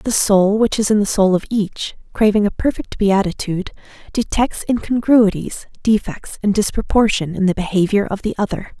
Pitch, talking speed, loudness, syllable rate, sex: 205 Hz, 165 wpm, -17 LUFS, 5.2 syllables/s, female